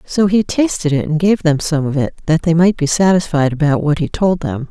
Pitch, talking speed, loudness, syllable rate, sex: 160 Hz, 255 wpm, -15 LUFS, 5.3 syllables/s, female